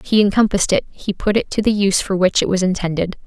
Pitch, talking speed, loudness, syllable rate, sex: 195 Hz, 275 wpm, -17 LUFS, 6.8 syllables/s, female